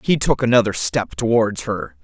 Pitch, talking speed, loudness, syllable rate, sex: 110 Hz, 175 wpm, -19 LUFS, 4.8 syllables/s, male